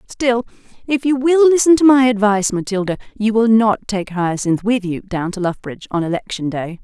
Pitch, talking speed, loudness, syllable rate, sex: 215 Hz, 195 wpm, -16 LUFS, 5.4 syllables/s, female